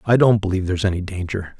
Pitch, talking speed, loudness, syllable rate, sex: 95 Hz, 225 wpm, -20 LUFS, 7.4 syllables/s, male